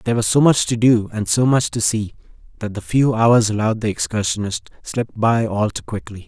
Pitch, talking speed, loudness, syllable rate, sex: 110 Hz, 220 wpm, -18 LUFS, 5.8 syllables/s, male